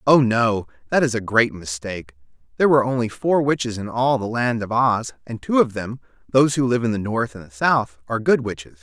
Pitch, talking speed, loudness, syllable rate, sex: 115 Hz, 230 wpm, -20 LUFS, 5.8 syllables/s, male